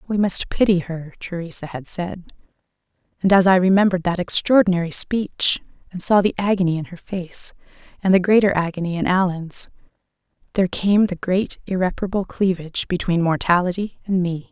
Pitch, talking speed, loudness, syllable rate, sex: 180 Hz, 155 wpm, -20 LUFS, 5.5 syllables/s, female